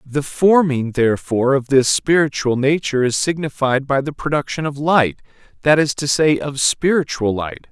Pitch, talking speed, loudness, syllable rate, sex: 140 Hz, 165 wpm, -17 LUFS, 4.9 syllables/s, male